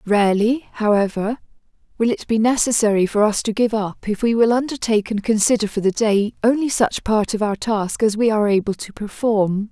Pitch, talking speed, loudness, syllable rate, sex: 220 Hz, 200 wpm, -19 LUFS, 5.4 syllables/s, female